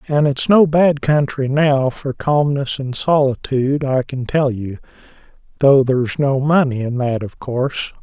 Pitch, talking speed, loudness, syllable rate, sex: 135 Hz, 155 wpm, -17 LUFS, 4.3 syllables/s, male